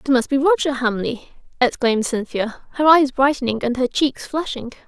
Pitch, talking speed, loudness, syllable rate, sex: 270 Hz, 170 wpm, -19 LUFS, 5.1 syllables/s, female